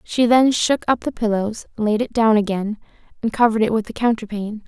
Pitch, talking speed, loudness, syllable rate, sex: 220 Hz, 205 wpm, -19 LUFS, 5.7 syllables/s, female